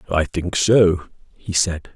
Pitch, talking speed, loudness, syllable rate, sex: 90 Hz, 155 wpm, -19 LUFS, 3.5 syllables/s, male